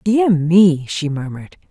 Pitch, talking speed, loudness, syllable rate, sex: 170 Hz, 140 wpm, -15 LUFS, 3.8 syllables/s, female